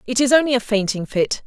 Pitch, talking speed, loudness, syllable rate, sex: 235 Hz, 245 wpm, -18 LUFS, 5.9 syllables/s, female